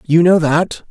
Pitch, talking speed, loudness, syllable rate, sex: 165 Hz, 200 wpm, -13 LUFS, 3.9 syllables/s, male